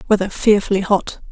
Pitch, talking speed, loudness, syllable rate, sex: 200 Hz, 135 wpm, -17 LUFS, 5.6 syllables/s, female